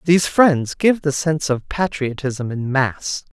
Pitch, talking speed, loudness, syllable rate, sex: 145 Hz, 160 wpm, -19 LUFS, 4.2 syllables/s, male